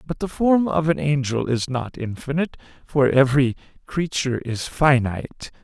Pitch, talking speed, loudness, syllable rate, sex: 135 Hz, 150 wpm, -21 LUFS, 5.0 syllables/s, male